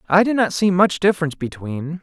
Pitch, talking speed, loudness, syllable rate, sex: 175 Hz, 205 wpm, -19 LUFS, 6.0 syllables/s, male